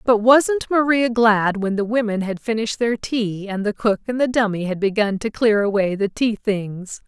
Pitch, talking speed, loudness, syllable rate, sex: 215 Hz, 210 wpm, -19 LUFS, 4.7 syllables/s, female